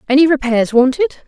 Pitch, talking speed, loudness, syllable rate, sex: 275 Hz, 140 wpm, -14 LUFS, 6.5 syllables/s, female